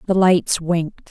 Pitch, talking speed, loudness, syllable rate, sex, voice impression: 175 Hz, 160 wpm, -18 LUFS, 4.3 syllables/s, female, very feminine, very adult-like, middle-aged, slightly thin, slightly tensed, powerful, slightly dark, slightly hard, muffled, slightly fluent, raspy, cool, slightly intellectual, slightly refreshing, sincere, very calm, mature, slightly friendly, slightly reassuring, very unique, very wild, slightly lively, strict, sharp